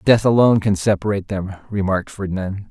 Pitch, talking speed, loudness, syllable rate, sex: 100 Hz, 155 wpm, -19 LUFS, 6.1 syllables/s, male